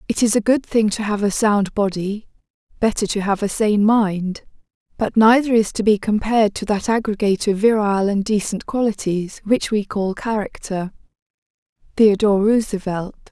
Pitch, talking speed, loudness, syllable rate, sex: 210 Hz, 160 wpm, -19 LUFS, 5.1 syllables/s, female